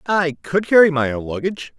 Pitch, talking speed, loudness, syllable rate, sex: 155 Hz, 200 wpm, -18 LUFS, 5.8 syllables/s, male